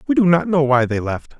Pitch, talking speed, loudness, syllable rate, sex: 155 Hz, 300 wpm, -17 LUFS, 5.7 syllables/s, male